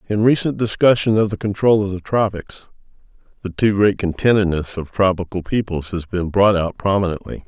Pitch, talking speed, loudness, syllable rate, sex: 100 Hz, 170 wpm, -18 LUFS, 5.4 syllables/s, male